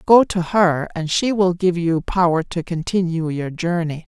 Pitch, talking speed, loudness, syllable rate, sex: 175 Hz, 190 wpm, -19 LUFS, 4.4 syllables/s, female